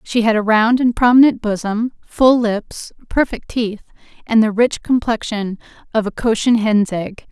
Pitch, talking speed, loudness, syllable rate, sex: 225 Hz, 165 wpm, -16 LUFS, 4.4 syllables/s, female